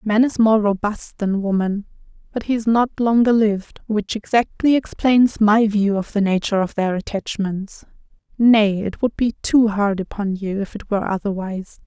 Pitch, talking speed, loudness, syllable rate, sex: 210 Hz, 175 wpm, -19 LUFS, 4.8 syllables/s, female